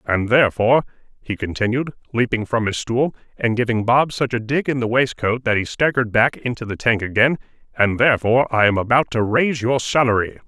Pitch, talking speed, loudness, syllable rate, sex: 120 Hz, 190 wpm, -19 LUFS, 5.8 syllables/s, male